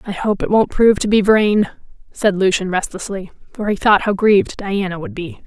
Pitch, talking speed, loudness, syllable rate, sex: 200 Hz, 210 wpm, -16 LUFS, 5.3 syllables/s, female